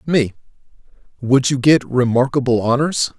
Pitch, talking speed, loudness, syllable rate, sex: 130 Hz, 115 wpm, -16 LUFS, 4.7 syllables/s, male